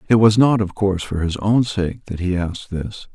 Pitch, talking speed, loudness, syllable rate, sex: 100 Hz, 250 wpm, -19 LUFS, 5.3 syllables/s, male